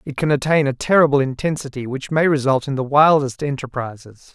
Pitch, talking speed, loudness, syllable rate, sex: 140 Hz, 180 wpm, -18 LUFS, 5.7 syllables/s, male